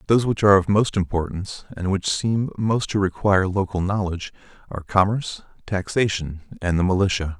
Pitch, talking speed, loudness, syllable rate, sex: 95 Hz, 160 wpm, -22 LUFS, 5.9 syllables/s, male